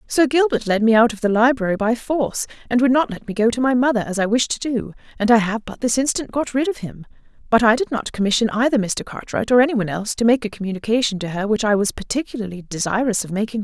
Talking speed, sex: 265 wpm, female